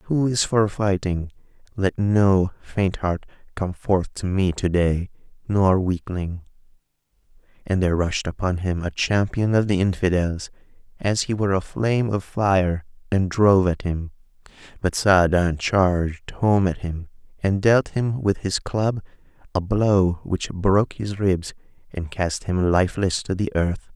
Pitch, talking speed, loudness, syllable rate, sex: 95 Hz, 155 wpm, -22 LUFS, 4.2 syllables/s, male